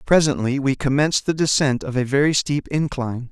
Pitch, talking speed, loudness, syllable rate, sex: 140 Hz, 180 wpm, -20 LUFS, 5.6 syllables/s, male